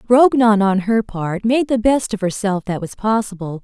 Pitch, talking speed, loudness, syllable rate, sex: 210 Hz, 200 wpm, -17 LUFS, 4.6 syllables/s, female